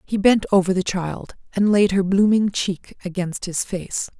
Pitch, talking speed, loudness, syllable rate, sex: 190 Hz, 185 wpm, -20 LUFS, 4.4 syllables/s, female